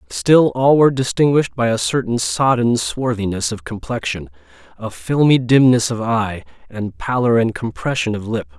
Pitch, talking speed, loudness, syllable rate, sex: 120 Hz, 155 wpm, -17 LUFS, 4.9 syllables/s, male